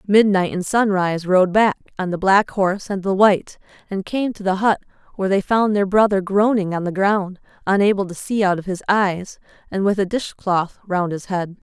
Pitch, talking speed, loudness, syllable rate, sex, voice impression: 195 Hz, 205 wpm, -19 LUFS, 5.1 syllables/s, female, feminine, adult-like, tensed, powerful, bright, soft, clear, intellectual, calm, lively, slightly sharp